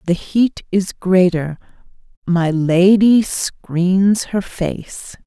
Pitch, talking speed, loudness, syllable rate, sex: 185 Hz, 105 wpm, -16 LUFS, 2.6 syllables/s, female